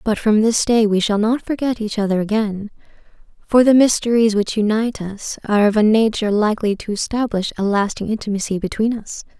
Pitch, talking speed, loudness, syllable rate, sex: 215 Hz, 185 wpm, -18 LUFS, 5.8 syllables/s, female